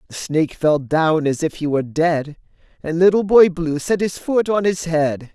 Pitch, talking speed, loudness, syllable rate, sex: 165 Hz, 215 wpm, -18 LUFS, 4.6 syllables/s, male